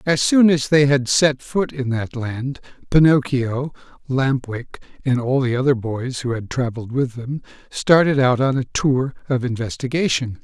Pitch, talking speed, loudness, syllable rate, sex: 130 Hz, 175 wpm, -19 LUFS, 4.4 syllables/s, male